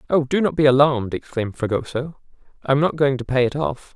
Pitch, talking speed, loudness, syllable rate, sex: 140 Hz, 225 wpm, -20 LUFS, 6.3 syllables/s, male